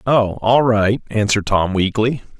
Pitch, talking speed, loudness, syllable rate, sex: 110 Hz, 125 wpm, -17 LUFS, 4.5 syllables/s, male